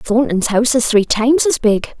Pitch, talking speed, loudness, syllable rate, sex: 235 Hz, 210 wpm, -14 LUFS, 5.2 syllables/s, female